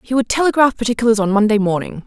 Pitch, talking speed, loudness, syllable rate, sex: 225 Hz, 205 wpm, -16 LUFS, 7.1 syllables/s, female